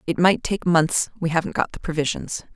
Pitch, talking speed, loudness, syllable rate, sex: 170 Hz, 190 wpm, -22 LUFS, 5.4 syllables/s, female